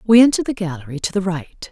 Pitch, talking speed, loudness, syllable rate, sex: 190 Hz, 245 wpm, -19 LUFS, 6.8 syllables/s, female